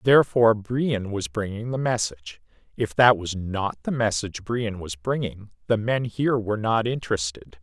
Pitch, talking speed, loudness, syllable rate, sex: 110 Hz, 165 wpm, -24 LUFS, 5.1 syllables/s, male